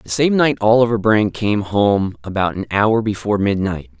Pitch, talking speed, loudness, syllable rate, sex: 105 Hz, 180 wpm, -17 LUFS, 4.8 syllables/s, male